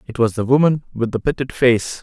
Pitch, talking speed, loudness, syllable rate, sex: 125 Hz, 235 wpm, -18 LUFS, 5.6 syllables/s, male